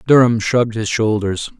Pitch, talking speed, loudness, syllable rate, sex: 110 Hz, 150 wpm, -16 LUFS, 5.0 syllables/s, male